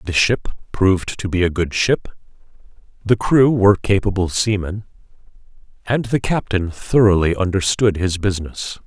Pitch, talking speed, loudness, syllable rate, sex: 95 Hz, 135 wpm, -18 LUFS, 4.8 syllables/s, male